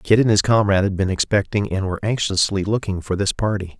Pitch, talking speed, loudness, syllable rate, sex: 100 Hz, 220 wpm, -19 LUFS, 6.2 syllables/s, male